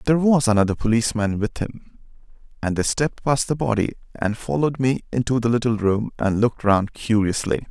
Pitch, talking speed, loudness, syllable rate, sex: 115 Hz, 180 wpm, -21 LUFS, 5.9 syllables/s, male